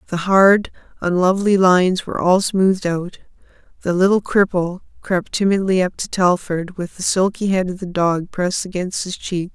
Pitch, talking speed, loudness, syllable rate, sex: 185 Hz, 170 wpm, -18 LUFS, 5.0 syllables/s, female